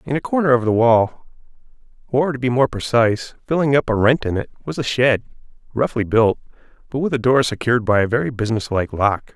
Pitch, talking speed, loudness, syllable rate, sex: 120 Hz, 210 wpm, -18 LUFS, 6.0 syllables/s, male